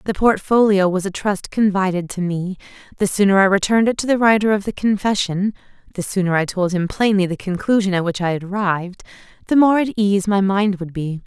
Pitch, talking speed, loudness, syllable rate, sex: 195 Hz, 200 wpm, -18 LUFS, 5.7 syllables/s, female